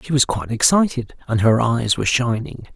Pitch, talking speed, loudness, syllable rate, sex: 120 Hz, 195 wpm, -18 LUFS, 5.7 syllables/s, male